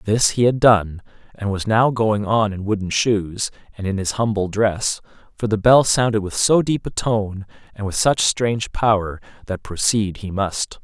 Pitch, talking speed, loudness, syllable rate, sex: 105 Hz, 195 wpm, -19 LUFS, 4.4 syllables/s, male